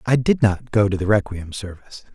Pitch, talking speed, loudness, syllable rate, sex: 105 Hz, 225 wpm, -20 LUFS, 5.7 syllables/s, male